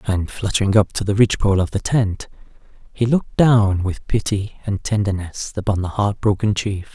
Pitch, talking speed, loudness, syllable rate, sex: 100 Hz, 180 wpm, -19 LUFS, 5.2 syllables/s, male